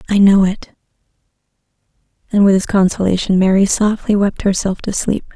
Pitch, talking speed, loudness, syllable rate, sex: 195 Hz, 145 wpm, -14 LUFS, 5.4 syllables/s, female